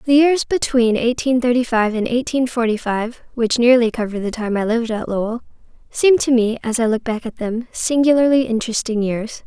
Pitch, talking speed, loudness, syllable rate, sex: 235 Hz, 195 wpm, -18 LUFS, 5.3 syllables/s, female